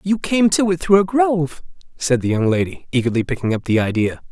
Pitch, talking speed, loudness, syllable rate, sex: 155 Hz, 225 wpm, -18 LUFS, 5.8 syllables/s, male